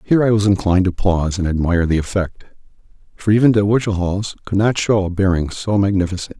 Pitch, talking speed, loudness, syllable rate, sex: 95 Hz, 195 wpm, -17 LUFS, 6.6 syllables/s, male